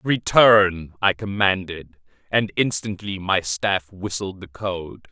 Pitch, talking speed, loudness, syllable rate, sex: 95 Hz, 115 wpm, -21 LUFS, 3.5 syllables/s, male